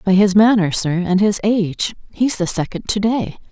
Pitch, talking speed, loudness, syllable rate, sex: 195 Hz, 205 wpm, -17 LUFS, 4.8 syllables/s, female